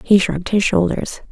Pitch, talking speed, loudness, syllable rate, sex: 190 Hz, 185 wpm, -17 LUFS, 5.3 syllables/s, female